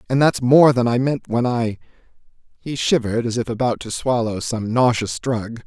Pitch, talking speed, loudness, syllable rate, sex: 120 Hz, 190 wpm, -19 LUFS, 5.0 syllables/s, male